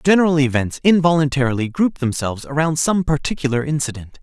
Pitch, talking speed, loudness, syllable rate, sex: 145 Hz, 130 wpm, -18 LUFS, 6.1 syllables/s, male